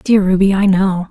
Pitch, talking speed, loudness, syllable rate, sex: 195 Hz, 215 wpm, -13 LUFS, 4.7 syllables/s, female